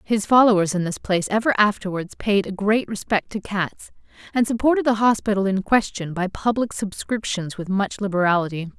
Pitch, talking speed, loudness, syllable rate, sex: 205 Hz, 170 wpm, -21 LUFS, 5.4 syllables/s, female